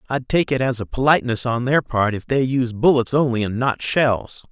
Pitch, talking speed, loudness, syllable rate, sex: 125 Hz, 225 wpm, -19 LUFS, 5.2 syllables/s, male